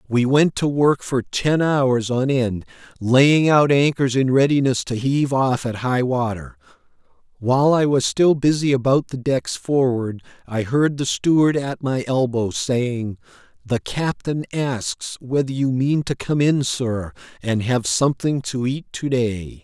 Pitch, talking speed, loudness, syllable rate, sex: 130 Hz, 165 wpm, -20 LUFS, 4.0 syllables/s, male